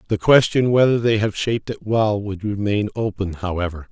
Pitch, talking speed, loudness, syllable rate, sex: 105 Hz, 185 wpm, -19 LUFS, 5.3 syllables/s, male